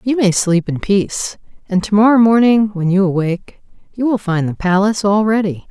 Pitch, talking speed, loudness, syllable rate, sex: 200 Hz, 200 wpm, -15 LUFS, 5.4 syllables/s, female